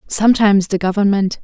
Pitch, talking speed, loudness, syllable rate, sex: 200 Hz, 125 wpm, -14 LUFS, 6.3 syllables/s, female